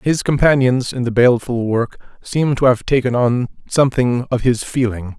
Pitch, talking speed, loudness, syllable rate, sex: 125 Hz, 175 wpm, -17 LUFS, 5.2 syllables/s, male